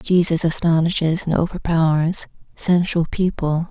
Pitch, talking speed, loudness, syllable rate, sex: 165 Hz, 95 wpm, -19 LUFS, 4.5 syllables/s, female